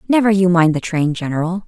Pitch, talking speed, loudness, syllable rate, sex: 180 Hz, 215 wpm, -16 LUFS, 6.0 syllables/s, female